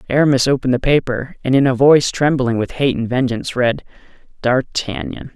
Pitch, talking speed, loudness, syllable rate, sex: 130 Hz, 170 wpm, -16 LUFS, 5.7 syllables/s, male